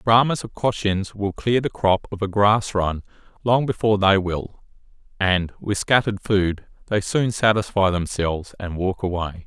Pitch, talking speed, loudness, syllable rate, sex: 100 Hz, 165 wpm, -21 LUFS, 4.6 syllables/s, male